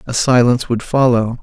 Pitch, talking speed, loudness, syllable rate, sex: 120 Hz, 170 wpm, -14 LUFS, 5.5 syllables/s, male